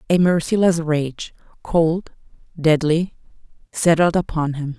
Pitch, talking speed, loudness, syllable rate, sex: 165 Hz, 100 wpm, -19 LUFS, 3.9 syllables/s, female